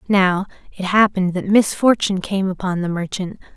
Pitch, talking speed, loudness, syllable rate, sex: 190 Hz, 150 wpm, -18 LUFS, 5.4 syllables/s, female